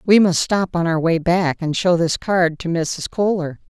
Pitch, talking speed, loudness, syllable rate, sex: 175 Hz, 225 wpm, -18 LUFS, 4.3 syllables/s, female